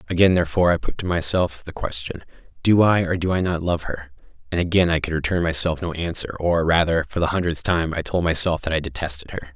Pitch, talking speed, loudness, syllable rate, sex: 85 Hz, 230 wpm, -21 LUFS, 6.2 syllables/s, male